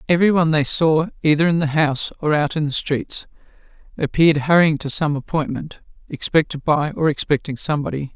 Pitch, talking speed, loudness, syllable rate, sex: 150 Hz, 170 wpm, -19 LUFS, 5.9 syllables/s, female